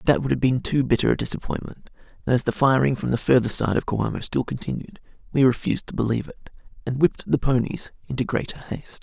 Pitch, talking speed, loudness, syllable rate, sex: 125 Hz, 220 wpm, -23 LUFS, 6.7 syllables/s, male